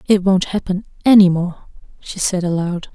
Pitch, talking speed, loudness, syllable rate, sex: 185 Hz, 165 wpm, -16 LUFS, 4.8 syllables/s, female